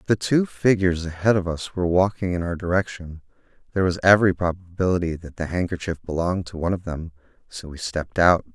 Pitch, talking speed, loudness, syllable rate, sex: 90 Hz, 190 wpm, -22 LUFS, 6.4 syllables/s, male